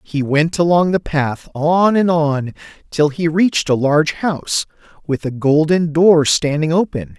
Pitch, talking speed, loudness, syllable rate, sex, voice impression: 155 Hz, 165 wpm, -16 LUFS, 4.3 syllables/s, male, very masculine, very adult-like, very middle-aged, slightly old, very thick, very tensed, very powerful, bright, slightly soft, very clear, fluent, very cool, intellectual, sincere, very calm, very mature, friendly, reassuring, wild, slightly sweet, lively, very kind